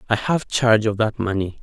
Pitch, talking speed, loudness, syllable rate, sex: 110 Hz, 220 wpm, -20 LUFS, 5.7 syllables/s, male